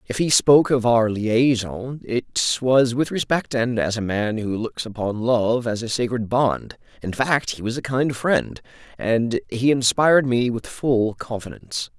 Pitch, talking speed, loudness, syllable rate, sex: 120 Hz, 180 wpm, -21 LUFS, 4.1 syllables/s, male